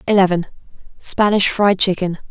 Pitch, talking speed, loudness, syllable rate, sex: 190 Hz, 80 wpm, -16 LUFS, 5.2 syllables/s, female